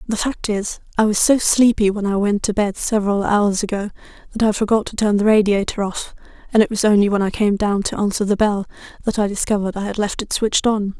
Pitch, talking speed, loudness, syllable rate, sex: 205 Hz, 240 wpm, -18 LUFS, 6.0 syllables/s, female